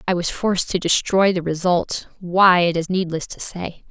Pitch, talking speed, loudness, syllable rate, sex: 180 Hz, 200 wpm, -19 LUFS, 4.7 syllables/s, female